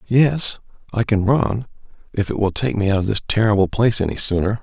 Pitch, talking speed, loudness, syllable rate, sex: 105 Hz, 210 wpm, -19 LUFS, 5.8 syllables/s, male